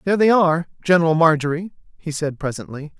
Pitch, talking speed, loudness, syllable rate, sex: 165 Hz, 140 wpm, -19 LUFS, 6.5 syllables/s, male